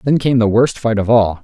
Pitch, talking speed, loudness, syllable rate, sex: 115 Hz, 290 wpm, -14 LUFS, 5.4 syllables/s, male